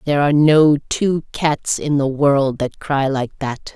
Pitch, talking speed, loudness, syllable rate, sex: 145 Hz, 190 wpm, -17 LUFS, 4.1 syllables/s, female